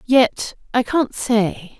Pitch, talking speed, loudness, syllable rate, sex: 235 Hz, 135 wpm, -19 LUFS, 2.7 syllables/s, female